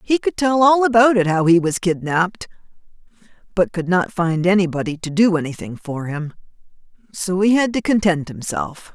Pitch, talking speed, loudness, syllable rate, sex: 185 Hz, 170 wpm, -18 LUFS, 5.0 syllables/s, female